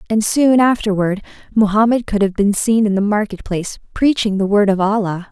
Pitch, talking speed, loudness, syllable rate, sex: 210 Hz, 190 wpm, -16 LUFS, 5.4 syllables/s, female